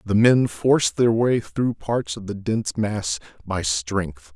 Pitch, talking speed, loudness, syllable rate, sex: 105 Hz, 180 wpm, -22 LUFS, 3.8 syllables/s, male